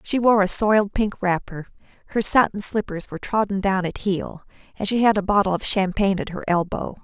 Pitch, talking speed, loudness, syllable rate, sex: 195 Hz, 205 wpm, -21 LUFS, 5.6 syllables/s, female